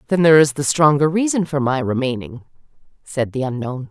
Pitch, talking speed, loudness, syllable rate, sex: 145 Hz, 185 wpm, -17 LUFS, 5.8 syllables/s, female